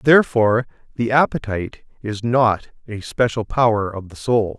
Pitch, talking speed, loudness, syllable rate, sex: 115 Hz, 145 wpm, -19 LUFS, 4.8 syllables/s, male